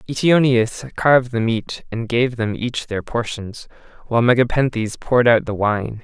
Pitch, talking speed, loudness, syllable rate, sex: 120 Hz, 160 wpm, -19 LUFS, 4.6 syllables/s, male